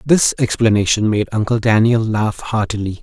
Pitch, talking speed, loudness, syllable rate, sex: 110 Hz, 140 wpm, -16 LUFS, 4.9 syllables/s, male